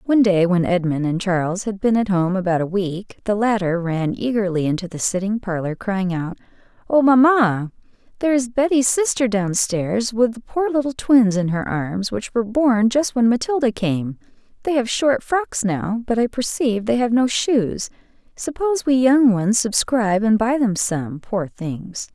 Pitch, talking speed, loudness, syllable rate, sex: 215 Hz, 185 wpm, -19 LUFS, 4.7 syllables/s, female